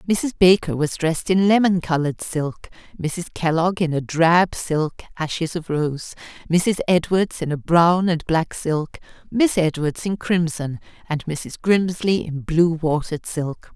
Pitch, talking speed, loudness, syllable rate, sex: 165 Hz, 155 wpm, -20 LUFS, 4.1 syllables/s, female